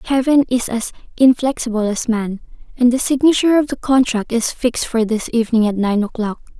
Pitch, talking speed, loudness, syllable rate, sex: 240 Hz, 180 wpm, -17 LUFS, 5.7 syllables/s, female